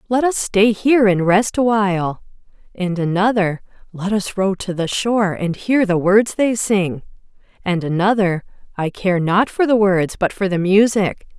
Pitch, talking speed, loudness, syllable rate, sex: 195 Hz, 175 wpm, -17 LUFS, 4.5 syllables/s, female